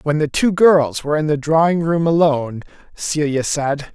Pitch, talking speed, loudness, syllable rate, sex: 150 Hz, 185 wpm, -17 LUFS, 4.9 syllables/s, male